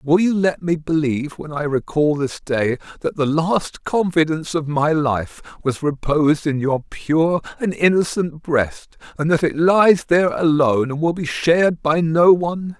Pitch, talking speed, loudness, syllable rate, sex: 160 Hz, 180 wpm, -19 LUFS, 4.5 syllables/s, male